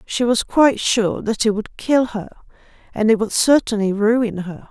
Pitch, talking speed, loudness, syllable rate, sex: 220 Hz, 180 wpm, -18 LUFS, 4.6 syllables/s, female